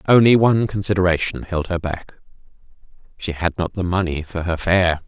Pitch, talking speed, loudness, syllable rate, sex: 90 Hz, 155 wpm, -19 LUFS, 5.4 syllables/s, male